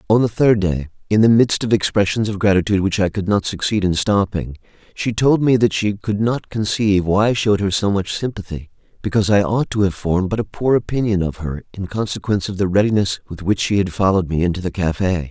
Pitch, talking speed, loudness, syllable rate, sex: 100 Hz, 230 wpm, -18 LUFS, 6.0 syllables/s, male